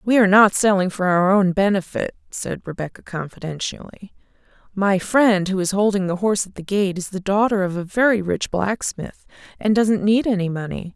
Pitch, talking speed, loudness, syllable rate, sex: 195 Hz, 185 wpm, -20 LUFS, 5.2 syllables/s, female